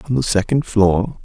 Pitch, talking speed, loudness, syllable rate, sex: 110 Hz, 195 wpm, -17 LUFS, 5.0 syllables/s, male